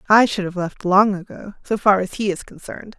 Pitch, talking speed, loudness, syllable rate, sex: 200 Hz, 240 wpm, -19 LUFS, 5.5 syllables/s, female